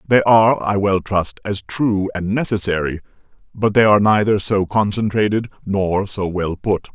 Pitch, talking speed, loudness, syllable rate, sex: 100 Hz, 165 wpm, -18 LUFS, 4.7 syllables/s, male